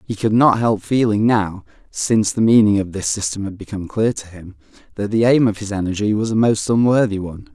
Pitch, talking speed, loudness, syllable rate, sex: 105 Hz, 225 wpm, -17 LUFS, 5.7 syllables/s, male